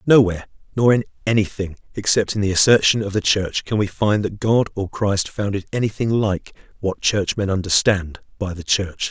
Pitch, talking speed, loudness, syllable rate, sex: 100 Hz, 180 wpm, -19 LUFS, 5.2 syllables/s, male